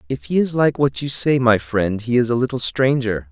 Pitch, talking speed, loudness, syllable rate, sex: 120 Hz, 255 wpm, -18 LUFS, 5.1 syllables/s, male